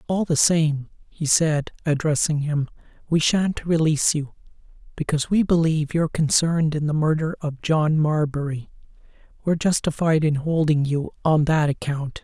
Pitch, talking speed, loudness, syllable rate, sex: 155 Hz, 145 wpm, -21 LUFS, 5.0 syllables/s, male